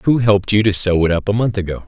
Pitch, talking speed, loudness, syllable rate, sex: 100 Hz, 320 wpm, -15 LUFS, 6.6 syllables/s, male